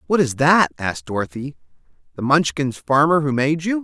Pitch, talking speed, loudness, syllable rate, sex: 140 Hz, 170 wpm, -19 LUFS, 5.2 syllables/s, male